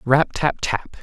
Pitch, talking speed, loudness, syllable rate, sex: 145 Hz, 175 wpm, -21 LUFS, 3.4 syllables/s, male